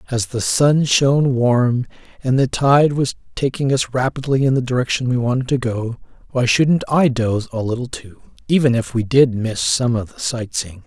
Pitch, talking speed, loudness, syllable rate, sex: 125 Hz, 195 wpm, -18 LUFS, 4.9 syllables/s, male